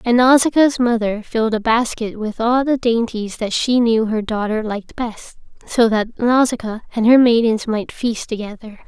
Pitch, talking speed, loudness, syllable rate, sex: 230 Hz, 175 wpm, -17 LUFS, 4.7 syllables/s, female